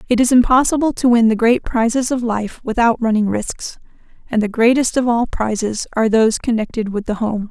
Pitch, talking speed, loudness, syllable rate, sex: 230 Hz, 200 wpm, -16 LUFS, 5.5 syllables/s, female